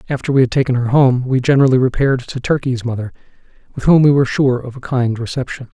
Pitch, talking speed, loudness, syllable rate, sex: 130 Hz, 220 wpm, -15 LUFS, 6.7 syllables/s, male